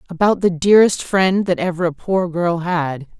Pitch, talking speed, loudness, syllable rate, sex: 175 Hz, 190 wpm, -17 LUFS, 4.8 syllables/s, female